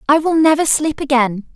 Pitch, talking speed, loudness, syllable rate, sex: 285 Hz, 195 wpm, -15 LUFS, 5.2 syllables/s, female